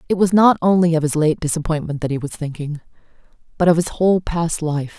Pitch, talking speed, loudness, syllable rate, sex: 165 Hz, 215 wpm, -18 LUFS, 6.0 syllables/s, female